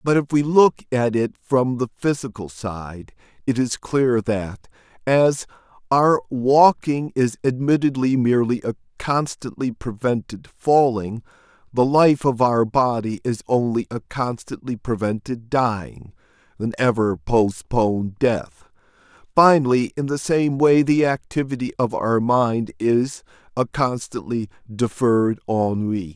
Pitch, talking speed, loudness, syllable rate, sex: 125 Hz, 125 wpm, -20 LUFS, 4.0 syllables/s, male